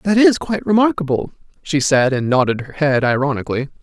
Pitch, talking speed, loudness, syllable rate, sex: 150 Hz, 175 wpm, -17 LUFS, 6.0 syllables/s, male